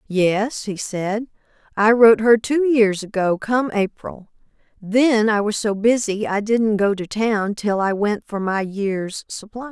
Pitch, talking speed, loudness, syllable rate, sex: 210 Hz, 175 wpm, -19 LUFS, 3.8 syllables/s, female